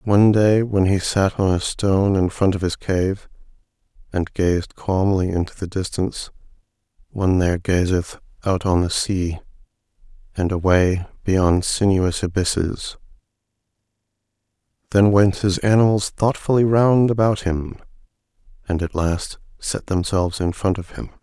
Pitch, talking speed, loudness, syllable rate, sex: 95 Hz, 130 wpm, -20 LUFS, 4.5 syllables/s, male